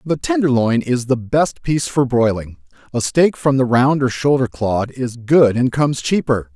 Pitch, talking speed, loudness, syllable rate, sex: 130 Hz, 190 wpm, -17 LUFS, 4.6 syllables/s, male